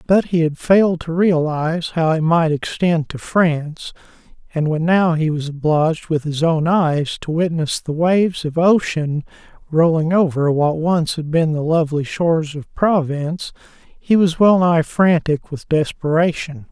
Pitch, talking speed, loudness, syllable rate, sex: 160 Hz, 165 wpm, -17 LUFS, 4.4 syllables/s, male